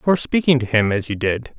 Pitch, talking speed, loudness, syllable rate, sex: 125 Hz, 265 wpm, -19 LUFS, 5.2 syllables/s, male